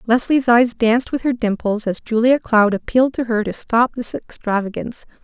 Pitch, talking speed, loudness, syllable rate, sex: 230 Hz, 185 wpm, -18 LUFS, 5.3 syllables/s, female